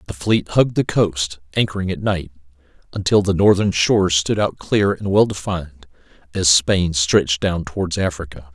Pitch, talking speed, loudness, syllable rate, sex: 90 Hz, 170 wpm, -18 LUFS, 5.0 syllables/s, male